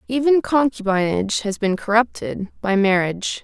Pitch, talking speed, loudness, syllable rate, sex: 215 Hz, 105 wpm, -19 LUFS, 5.0 syllables/s, female